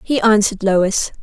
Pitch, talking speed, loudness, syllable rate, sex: 205 Hz, 145 wpm, -15 LUFS, 4.8 syllables/s, female